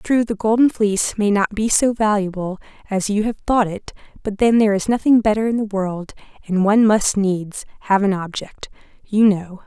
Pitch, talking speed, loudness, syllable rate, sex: 205 Hz, 200 wpm, -18 LUFS, 5.2 syllables/s, female